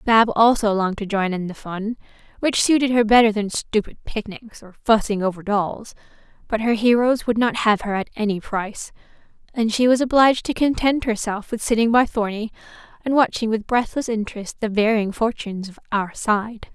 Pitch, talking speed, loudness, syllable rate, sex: 220 Hz, 185 wpm, -20 LUFS, 5.3 syllables/s, female